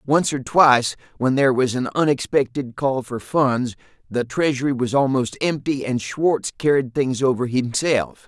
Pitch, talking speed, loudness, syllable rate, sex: 130 Hz, 160 wpm, -20 LUFS, 4.6 syllables/s, male